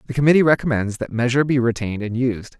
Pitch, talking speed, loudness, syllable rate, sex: 125 Hz, 210 wpm, -19 LUFS, 7.1 syllables/s, male